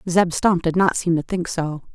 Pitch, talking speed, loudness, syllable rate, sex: 175 Hz, 245 wpm, -20 LUFS, 4.6 syllables/s, female